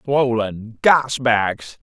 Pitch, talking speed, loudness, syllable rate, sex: 120 Hz, 95 wpm, -18 LUFS, 2.3 syllables/s, male